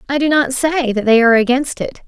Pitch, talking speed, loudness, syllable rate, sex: 260 Hz, 260 wpm, -14 LUFS, 5.8 syllables/s, female